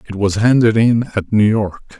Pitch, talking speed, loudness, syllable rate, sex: 105 Hz, 210 wpm, -15 LUFS, 4.4 syllables/s, male